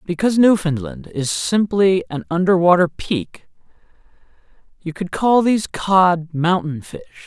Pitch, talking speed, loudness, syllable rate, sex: 170 Hz, 115 wpm, -17 LUFS, 4.3 syllables/s, male